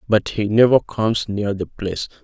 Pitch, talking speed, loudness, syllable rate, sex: 105 Hz, 190 wpm, -19 LUFS, 5.1 syllables/s, male